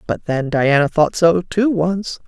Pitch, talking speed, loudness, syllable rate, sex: 170 Hz, 185 wpm, -17 LUFS, 3.8 syllables/s, female